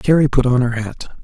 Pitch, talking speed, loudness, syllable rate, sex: 130 Hz, 245 wpm, -16 LUFS, 5.2 syllables/s, male